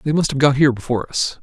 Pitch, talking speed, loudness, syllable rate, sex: 140 Hz, 295 wpm, -18 LUFS, 7.5 syllables/s, male